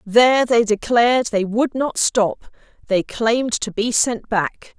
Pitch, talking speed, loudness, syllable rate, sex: 230 Hz, 165 wpm, -18 LUFS, 4.0 syllables/s, female